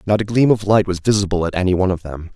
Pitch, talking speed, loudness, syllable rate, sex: 95 Hz, 305 wpm, -17 LUFS, 7.3 syllables/s, male